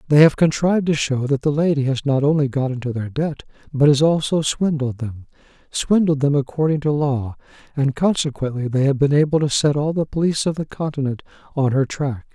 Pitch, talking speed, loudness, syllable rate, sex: 145 Hz, 195 wpm, -19 LUFS, 5.7 syllables/s, male